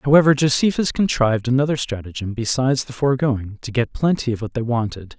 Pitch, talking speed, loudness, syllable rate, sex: 125 Hz, 175 wpm, -20 LUFS, 6.1 syllables/s, male